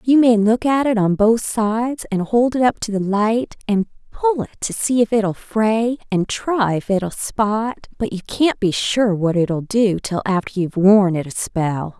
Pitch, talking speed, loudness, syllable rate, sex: 215 Hz, 215 wpm, -18 LUFS, 4.1 syllables/s, female